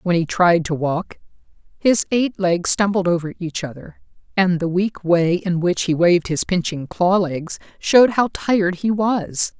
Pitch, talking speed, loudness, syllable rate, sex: 175 Hz, 180 wpm, -19 LUFS, 4.3 syllables/s, female